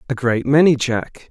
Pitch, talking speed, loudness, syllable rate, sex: 130 Hz, 185 wpm, -17 LUFS, 4.4 syllables/s, male